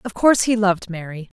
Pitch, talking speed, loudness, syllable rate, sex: 200 Hz, 215 wpm, -18 LUFS, 6.5 syllables/s, female